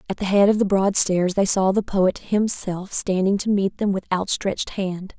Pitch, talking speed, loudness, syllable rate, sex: 195 Hz, 220 wpm, -21 LUFS, 4.6 syllables/s, female